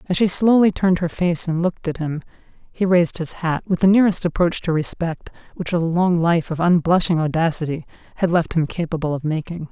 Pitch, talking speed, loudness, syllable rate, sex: 170 Hz, 205 wpm, -19 LUFS, 5.8 syllables/s, female